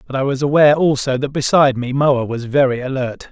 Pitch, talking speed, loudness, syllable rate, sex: 135 Hz, 215 wpm, -16 LUFS, 6.0 syllables/s, male